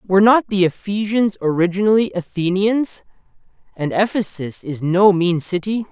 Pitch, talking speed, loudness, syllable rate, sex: 190 Hz, 120 wpm, -18 LUFS, 4.8 syllables/s, male